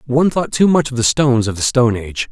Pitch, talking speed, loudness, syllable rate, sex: 125 Hz, 285 wpm, -15 LUFS, 6.9 syllables/s, male